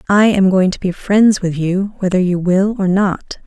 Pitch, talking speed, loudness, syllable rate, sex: 190 Hz, 225 wpm, -15 LUFS, 4.4 syllables/s, female